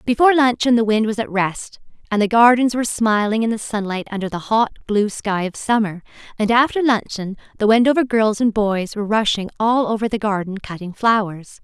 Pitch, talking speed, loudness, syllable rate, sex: 220 Hz, 195 wpm, -18 LUFS, 5.5 syllables/s, female